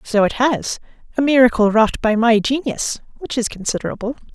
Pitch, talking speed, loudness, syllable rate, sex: 235 Hz, 150 wpm, -18 LUFS, 5.4 syllables/s, female